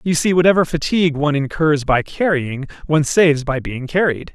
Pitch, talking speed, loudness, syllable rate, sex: 155 Hz, 180 wpm, -17 LUFS, 5.7 syllables/s, male